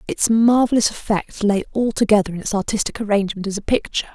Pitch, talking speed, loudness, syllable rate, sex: 210 Hz, 175 wpm, -19 LUFS, 6.5 syllables/s, female